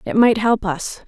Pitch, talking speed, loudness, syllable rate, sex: 215 Hz, 225 wpm, -18 LUFS, 4.2 syllables/s, female